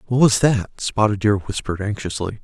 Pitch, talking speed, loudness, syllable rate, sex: 105 Hz, 175 wpm, -20 LUFS, 5.3 syllables/s, male